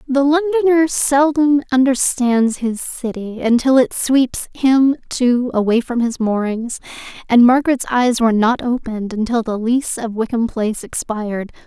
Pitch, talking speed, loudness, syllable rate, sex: 245 Hz, 145 wpm, -16 LUFS, 4.5 syllables/s, female